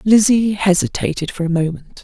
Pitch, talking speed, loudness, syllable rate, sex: 185 Hz, 145 wpm, -17 LUFS, 5.2 syllables/s, female